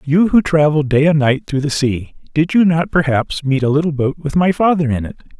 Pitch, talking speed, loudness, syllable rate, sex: 150 Hz, 245 wpm, -15 LUFS, 5.3 syllables/s, male